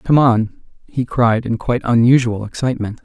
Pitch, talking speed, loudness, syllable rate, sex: 120 Hz, 160 wpm, -16 LUFS, 5.1 syllables/s, male